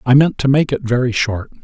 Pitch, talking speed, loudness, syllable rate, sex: 130 Hz, 255 wpm, -16 LUFS, 5.8 syllables/s, male